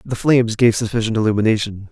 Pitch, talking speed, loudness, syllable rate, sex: 110 Hz, 155 wpm, -17 LUFS, 6.6 syllables/s, male